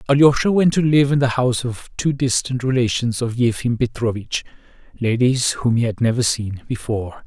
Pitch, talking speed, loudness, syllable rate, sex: 125 Hz, 175 wpm, -19 LUFS, 5.3 syllables/s, male